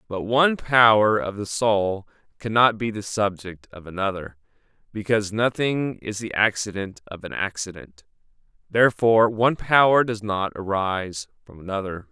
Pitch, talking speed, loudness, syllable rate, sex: 105 Hz, 140 wpm, -22 LUFS, 4.9 syllables/s, male